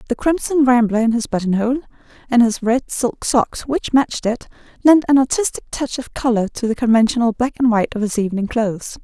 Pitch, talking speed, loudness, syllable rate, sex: 240 Hz, 205 wpm, -17 LUFS, 5.7 syllables/s, female